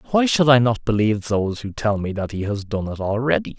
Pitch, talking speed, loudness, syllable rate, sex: 110 Hz, 250 wpm, -20 LUFS, 6.0 syllables/s, male